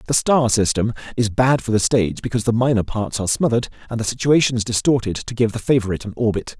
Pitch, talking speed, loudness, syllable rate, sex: 115 Hz, 220 wpm, -19 LUFS, 6.7 syllables/s, male